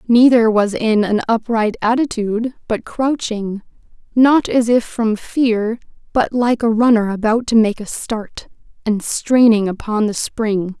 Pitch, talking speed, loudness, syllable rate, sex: 225 Hz, 145 wpm, -16 LUFS, 4.0 syllables/s, female